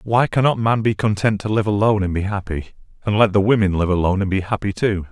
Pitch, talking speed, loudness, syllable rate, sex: 100 Hz, 245 wpm, -19 LUFS, 6.4 syllables/s, male